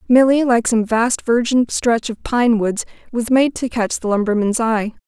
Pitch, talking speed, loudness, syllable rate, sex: 230 Hz, 190 wpm, -17 LUFS, 4.4 syllables/s, female